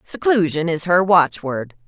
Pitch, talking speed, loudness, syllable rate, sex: 170 Hz, 130 wpm, -18 LUFS, 4.1 syllables/s, female